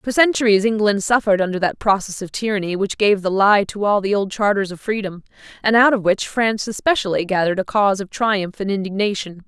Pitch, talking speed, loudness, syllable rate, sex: 205 Hz, 210 wpm, -18 LUFS, 6.0 syllables/s, female